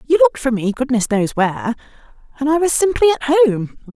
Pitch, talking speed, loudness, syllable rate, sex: 260 Hz, 195 wpm, -16 LUFS, 6.5 syllables/s, female